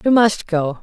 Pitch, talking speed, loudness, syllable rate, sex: 190 Hz, 215 wpm, -17 LUFS, 4.2 syllables/s, female